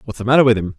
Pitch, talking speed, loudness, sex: 115 Hz, 385 wpm, -15 LUFS, male